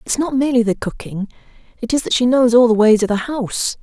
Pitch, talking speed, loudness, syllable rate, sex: 235 Hz, 250 wpm, -16 LUFS, 6.3 syllables/s, female